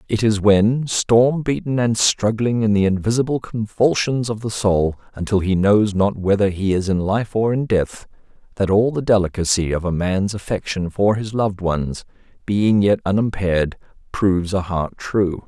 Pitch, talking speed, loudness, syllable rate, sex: 105 Hz, 175 wpm, -19 LUFS, 4.6 syllables/s, male